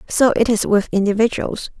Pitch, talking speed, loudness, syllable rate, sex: 215 Hz, 165 wpm, -17 LUFS, 5.3 syllables/s, female